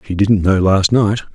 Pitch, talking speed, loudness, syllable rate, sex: 100 Hz, 225 wpm, -14 LUFS, 4.8 syllables/s, male